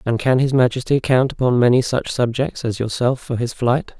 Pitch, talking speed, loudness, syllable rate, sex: 125 Hz, 210 wpm, -18 LUFS, 5.2 syllables/s, male